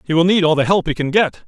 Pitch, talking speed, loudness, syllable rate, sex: 170 Hz, 365 wpm, -16 LUFS, 6.6 syllables/s, male